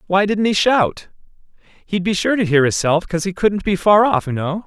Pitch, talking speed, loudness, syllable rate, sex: 185 Hz, 245 wpm, -17 LUFS, 5.1 syllables/s, male